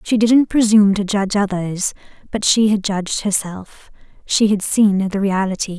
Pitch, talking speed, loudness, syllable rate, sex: 200 Hz, 165 wpm, -17 LUFS, 4.8 syllables/s, female